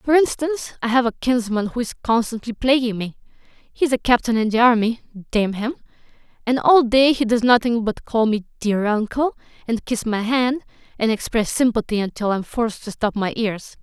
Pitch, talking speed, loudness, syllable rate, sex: 230 Hz, 200 wpm, -20 LUFS, 5.3 syllables/s, female